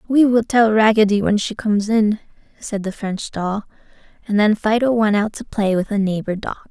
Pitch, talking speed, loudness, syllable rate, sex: 210 Hz, 205 wpm, -18 LUFS, 5.2 syllables/s, female